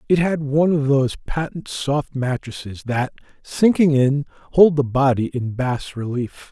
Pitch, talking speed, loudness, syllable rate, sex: 140 Hz, 155 wpm, -20 LUFS, 4.5 syllables/s, male